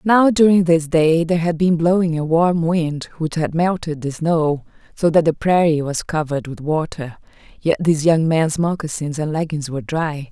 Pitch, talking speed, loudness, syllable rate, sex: 160 Hz, 190 wpm, -18 LUFS, 4.8 syllables/s, female